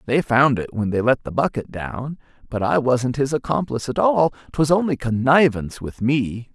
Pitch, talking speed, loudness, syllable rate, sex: 130 Hz, 190 wpm, -20 LUFS, 4.9 syllables/s, male